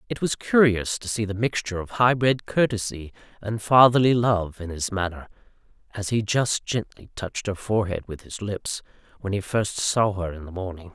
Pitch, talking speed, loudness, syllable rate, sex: 105 Hz, 190 wpm, -24 LUFS, 5.1 syllables/s, male